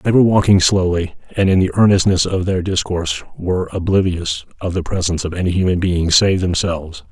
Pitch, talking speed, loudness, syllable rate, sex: 90 Hz, 185 wpm, -16 LUFS, 5.9 syllables/s, male